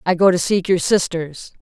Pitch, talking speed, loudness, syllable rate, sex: 180 Hz, 220 wpm, -17 LUFS, 4.9 syllables/s, female